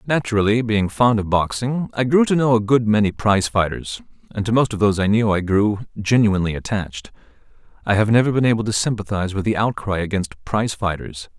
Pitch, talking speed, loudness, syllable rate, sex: 105 Hz, 200 wpm, -19 LUFS, 6.0 syllables/s, male